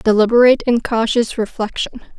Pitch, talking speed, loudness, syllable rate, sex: 230 Hz, 110 wpm, -16 LUFS, 5.5 syllables/s, female